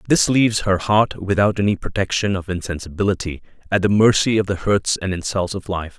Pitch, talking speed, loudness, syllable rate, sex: 100 Hz, 190 wpm, -19 LUFS, 5.7 syllables/s, male